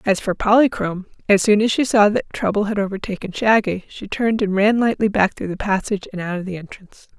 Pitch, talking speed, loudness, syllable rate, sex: 205 Hz, 225 wpm, -19 LUFS, 6.1 syllables/s, female